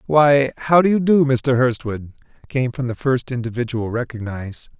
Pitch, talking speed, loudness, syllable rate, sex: 130 Hz, 165 wpm, -19 LUFS, 5.0 syllables/s, male